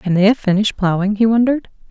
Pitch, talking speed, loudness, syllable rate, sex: 210 Hz, 220 wpm, -16 LUFS, 7.1 syllables/s, female